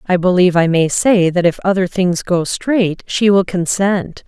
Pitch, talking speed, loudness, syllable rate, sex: 185 Hz, 195 wpm, -15 LUFS, 4.4 syllables/s, female